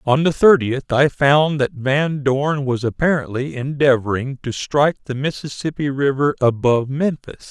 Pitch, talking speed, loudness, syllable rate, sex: 135 Hz, 145 wpm, -18 LUFS, 4.6 syllables/s, male